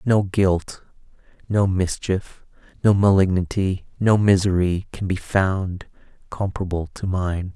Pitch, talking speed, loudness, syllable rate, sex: 95 Hz, 110 wpm, -21 LUFS, 3.9 syllables/s, male